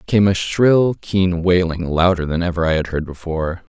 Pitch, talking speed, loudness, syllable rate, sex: 90 Hz, 175 wpm, -18 LUFS, 4.8 syllables/s, male